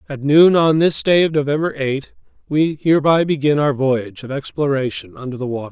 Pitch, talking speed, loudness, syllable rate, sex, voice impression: 145 Hz, 190 wpm, -17 LUFS, 5.6 syllables/s, male, masculine, middle-aged, slightly thick, sincere, slightly elegant, slightly kind